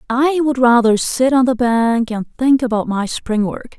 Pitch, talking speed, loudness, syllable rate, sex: 240 Hz, 205 wpm, -16 LUFS, 4.2 syllables/s, female